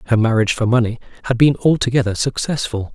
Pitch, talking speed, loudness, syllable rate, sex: 120 Hz, 165 wpm, -17 LUFS, 6.6 syllables/s, male